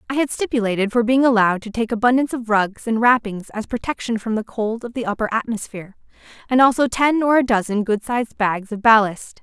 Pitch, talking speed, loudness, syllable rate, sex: 230 Hz, 210 wpm, -19 LUFS, 6.0 syllables/s, female